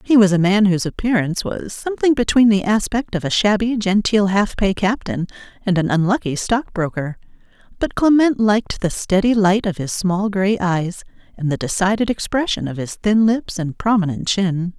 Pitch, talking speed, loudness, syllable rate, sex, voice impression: 200 Hz, 180 wpm, -18 LUFS, 5.1 syllables/s, female, very feminine, adult-like, slightly fluent, slightly intellectual, slightly elegant